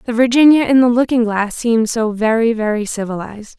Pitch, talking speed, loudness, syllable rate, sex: 230 Hz, 185 wpm, -14 LUFS, 5.8 syllables/s, female